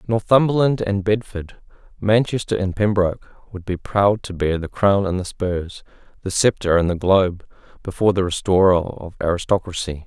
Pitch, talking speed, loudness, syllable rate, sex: 95 Hz, 155 wpm, -19 LUFS, 5.1 syllables/s, male